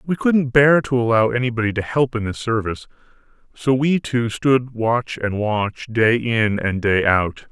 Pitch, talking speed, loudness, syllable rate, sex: 120 Hz, 185 wpm, -19 LUFS, 4.3 syllables/s, male